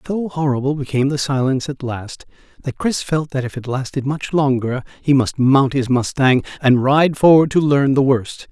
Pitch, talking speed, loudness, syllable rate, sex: 135 Hz, 195 wpm, -17 LUFS, 5.1 syllables/s, male